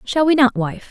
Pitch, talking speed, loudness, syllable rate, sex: 250 Hz, 265 wpm, -16 LUFS, 4.9 syllables/s, female